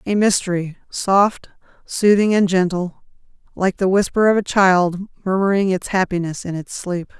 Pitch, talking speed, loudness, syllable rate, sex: 190 Hz, 150 wpm, -18 LUFS, 4.6 syllables/s, female